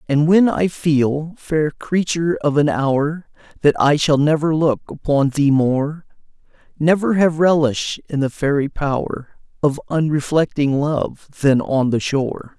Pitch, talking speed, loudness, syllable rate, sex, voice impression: 150 Hz, 145 wpm, -18 LUFS, 3.9 syllables/s, male, masculine, adult-like, slightly middle-aged, tensed, slightly powerful, slightly soft, clear, fluent, slightly cool, intellectual, slightly refreshing, sincere, slightly calm, slightly friendly, slightly elegant, wild, very lively, slightly strict, slightly intense